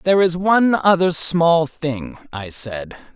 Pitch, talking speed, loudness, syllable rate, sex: 160 Hz, 150 wpm, -17 LUFS, 4.0 syllables/s, male